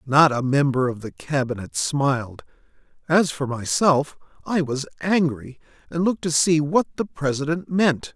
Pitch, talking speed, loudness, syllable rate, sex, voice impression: 150 Hz, 155 wpm, -22 LUFS, 4.6 syllables/s, male, very masculine, very adult-like, very middle-aged, thick, tensed, slightly powerful, bright, hard, clear, fluent, cool, slightly intellectual, sincere, slightly calm, slightly mature, slightly reassuring, slightly unique, wild, lively, slightly strict, slightly intense, slightly light